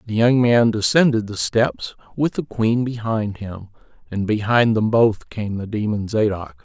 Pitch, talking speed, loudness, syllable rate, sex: 110 Hz, 170 wpm, -19 LUFS, 4.3 syllables/s, male